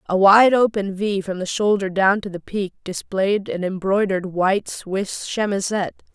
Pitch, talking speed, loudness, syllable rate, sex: 195 Hz, 165 wpm, -20 LUFS, 4.7 syllables/s, female